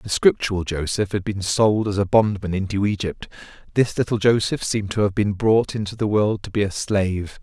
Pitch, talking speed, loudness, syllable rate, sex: 100 Hz, 210 wpm, -21 LUFS, 5.3 syllables/s, male